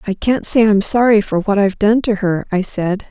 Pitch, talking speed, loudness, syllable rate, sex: 205 Hz, 250 wpm, -15 LUFS, 5.2 syllables/s, female